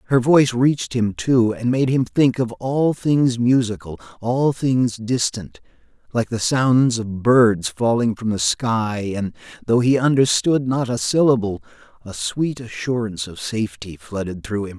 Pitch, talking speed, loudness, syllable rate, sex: 120 Hz, 160 wpm, -19 LUFS, 4.3 syllables/s, male